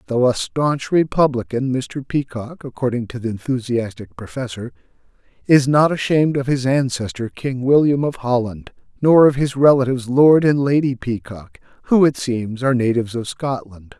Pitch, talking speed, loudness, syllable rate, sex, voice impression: 130 Hz, 155 wpm, -18 LUFS, 5.0 syllables/s, male, masculine, slightly old, thick, tensed, powerful, slightly muffled, slightly halting, slightly raspy, calm, mature, friendly, reassuring, wild, lively, slightly kind